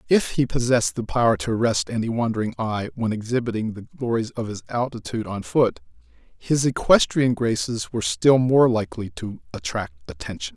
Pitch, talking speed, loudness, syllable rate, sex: 110 Hz, 165 wpm, -22 LUFS, 5.3 syllables/s, male